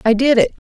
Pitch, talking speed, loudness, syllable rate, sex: 235 Hz, 265 wpm, -15 LUFS, 6.4 syllables/s, female